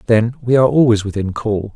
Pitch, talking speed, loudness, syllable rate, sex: 110 Hz, 205 wpm, -15 LUFS, 6.0 syllables/s, male